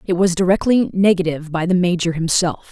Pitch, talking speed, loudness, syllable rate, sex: 180 Hz, 175 wpm, -17 LUFS, 6.0 syllables/s, female